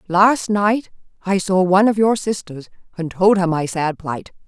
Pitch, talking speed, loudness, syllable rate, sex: 190 Hz, 190 wpm, -18 LUFS, 4.4 syllables/s, female